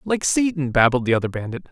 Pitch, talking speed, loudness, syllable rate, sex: 145 Hz, 210 wpm, -20 LUFS, 6.2 syllables/s, male